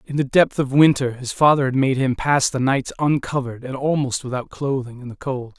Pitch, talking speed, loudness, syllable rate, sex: 135 Hz, 225 wpm, -20 LUFS, 5.4 syllables/s, male